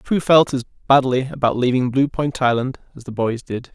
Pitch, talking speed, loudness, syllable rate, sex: 130 Hz, 210 wpm, -19 LUFS, 4.9 syllables/s, male